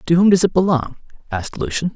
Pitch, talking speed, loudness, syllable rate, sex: 165 Hz, 215 wpm, -18 LUFS, 6.8 syllables/s, male